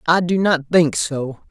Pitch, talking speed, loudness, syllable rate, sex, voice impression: 150 Hz, 200 wpm, -18 LUFS, 3.9 syllables/s, male, masculine, very adult-like, slightly thick, slightly sincere, slightly friendly, slightly unique